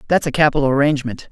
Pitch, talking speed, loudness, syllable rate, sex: 140 Hz, 185 wpm, -17 LUFS, 8.1 syllables/s, male